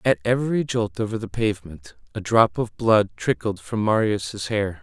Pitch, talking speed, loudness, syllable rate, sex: 110 Hz, 175 wpm, -22 LUFS, 4.8 syllables/s, male